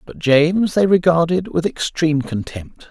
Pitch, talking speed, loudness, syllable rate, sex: 165 Hz, 145 wpm, -17 LUFS, 4.7 syllables/s, male